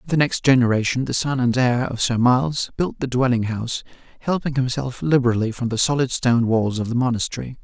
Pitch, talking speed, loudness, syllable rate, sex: 125 Hz, 205 wpm, -20 LUFS, 6.0 syllables/s, male